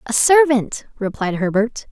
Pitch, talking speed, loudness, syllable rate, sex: 240 Hz, 125 wpm, -17 LUFS, 4.2 syllables/s, female